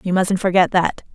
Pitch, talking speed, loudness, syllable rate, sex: 185 Hz, 210 wpm, -18 LUFS, 5.2 syllables/s, female